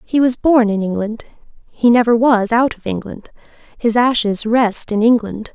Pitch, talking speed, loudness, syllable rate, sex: 225 Hz, 175 wpm, -15 LUFS, 4.6 syllables/s, female